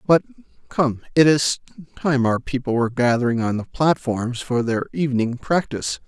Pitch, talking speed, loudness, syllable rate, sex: 130 Hz, 160 wpm, -21 LUFS, 4.8 syllables/s, male